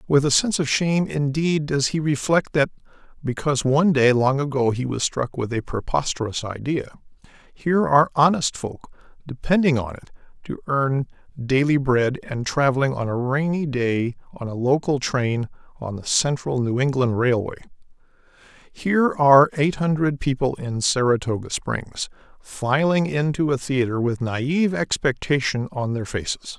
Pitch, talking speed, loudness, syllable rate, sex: 135 Hz, 150 wpm, -21 LUFS, 4.9 syllables/s, male